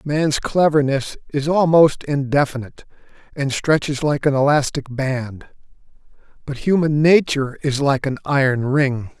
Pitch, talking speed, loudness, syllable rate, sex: 140 Hz, 125 wpm, -18 LUFS, 4.4 syllables/s, male